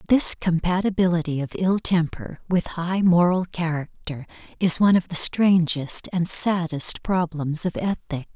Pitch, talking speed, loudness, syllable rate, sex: 175 Hz, 135 wpm, -21 LUFS, 4.3 syllables/s, female